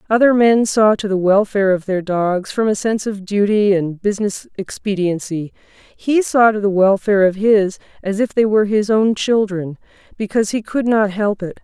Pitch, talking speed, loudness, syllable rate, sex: 205 Hz, 190 wpm, -16 LUFS, 5.1 syllables/s, female